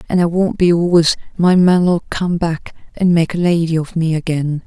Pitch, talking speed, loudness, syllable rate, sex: 170 Hz, 205 wpm, -15 LUFS, 4.7 syllables/s, female